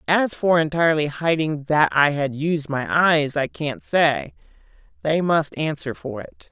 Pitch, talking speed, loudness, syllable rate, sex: 155 Hz, 165 wpm, -21 LUFS, 4.1 syllables/s, female